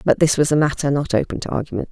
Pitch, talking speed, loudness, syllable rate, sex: 140 Hz, 280 wpm, -19 LUFS, 7.2 syllables/s, female